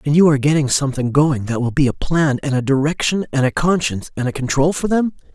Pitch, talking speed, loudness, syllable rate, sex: 145 Hz, 245 wpm, -17 LUFS, 6.3 syllables/s, male